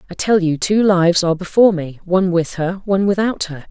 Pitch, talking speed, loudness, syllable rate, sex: 180 Hz, 225 wpm, -16 LUFS, 6.2 syllables/s, female